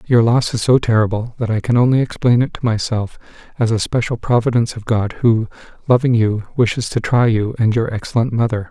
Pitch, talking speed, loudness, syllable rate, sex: 115 Hz, 205 wpm, -17 LUFS, 5.9 syllables/s, male